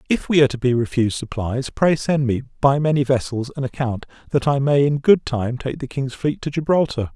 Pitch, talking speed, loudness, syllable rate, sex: 130 Hz, 225 wpm, -20 LUFS, 5.6 syllables/s, male